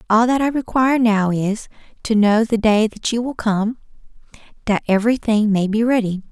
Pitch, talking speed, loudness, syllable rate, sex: 220 Hz, 190 wpm, -18 LUFS, 5.2 syllables/s, female